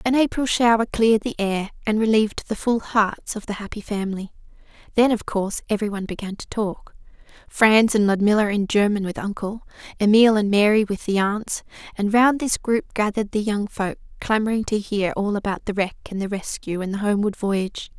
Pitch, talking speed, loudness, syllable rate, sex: 210 Hz, 185 wpm, -21 LUFS, 5.5 syllables/s, female